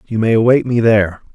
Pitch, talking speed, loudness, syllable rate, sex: 115 Hz, 225 wpm, -14 LUFS, 6.4 syllables/s, male